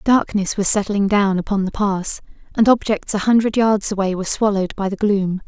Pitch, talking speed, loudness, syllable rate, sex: 200 Hz, 195 wpm, -18 LUFS, 5.4 syllables/s, female